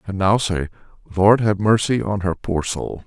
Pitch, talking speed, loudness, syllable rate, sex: 100 Hz, 195 wpm, -19 LUFS, 4.6 syllables/s, male